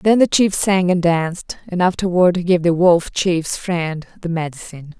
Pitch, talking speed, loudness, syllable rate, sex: 175 Hz, 190 wpm, -17 LUFS, 4.8 syllables/s, female